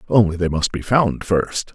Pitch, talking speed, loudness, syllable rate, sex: 95 Hz, 205 wpm, -19 LUFS, 4.5 syllables/s, male